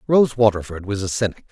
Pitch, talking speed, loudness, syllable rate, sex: 110 Hz, 200 wpm, -20 LUFS, 6.0 syllables/s, male